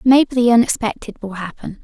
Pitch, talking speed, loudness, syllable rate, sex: 230 Hz, 165 wpm, -16 LUFS, 5.8 syllables/s, female